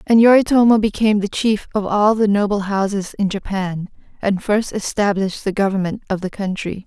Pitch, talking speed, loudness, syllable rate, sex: 205 Hz, 175 wpm, -18 LUFS, 5.4 syllables/s, female